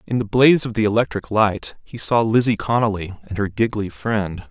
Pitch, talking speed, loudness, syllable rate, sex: 110 Hz, 200 wpm, -19 LUFS, 5.2 syllables/s, male